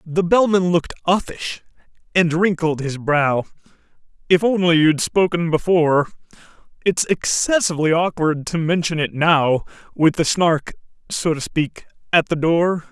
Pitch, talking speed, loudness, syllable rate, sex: 165 Hz, 135 wpm, -18 LUFS, 4.5 syllables/s, male